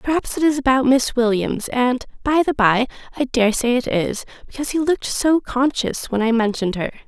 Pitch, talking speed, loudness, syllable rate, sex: 255 Hz, 205 wpm, -19 LUFS, 5.4 syllables/s, female